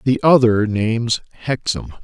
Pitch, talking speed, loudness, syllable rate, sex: 115 Hz, 120 wpm, -17 LUFS, 4.4 syllables/s, male